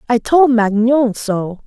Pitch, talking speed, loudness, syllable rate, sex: 235 Hz, 145 wpm, -14 LUFS, 3.4 syllables/s, female